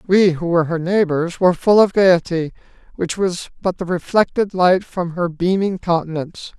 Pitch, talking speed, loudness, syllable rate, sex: 180 Hz, 175 wpm, -18 LUFS, 5.0 syllables/s, male